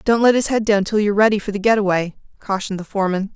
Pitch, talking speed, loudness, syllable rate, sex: 205 Hz, 270 wpm, -18 LUFS, 7.3 syllables/s, female